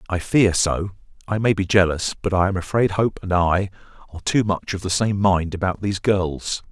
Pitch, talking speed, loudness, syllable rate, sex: 95 Hz, 195 wpm, -21 LUFS, 5.2 syllables/s, male